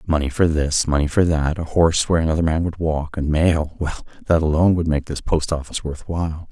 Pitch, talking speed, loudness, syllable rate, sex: 80 Hz, 220 wpm, -20 LUFS, 6.0 syllables/s, male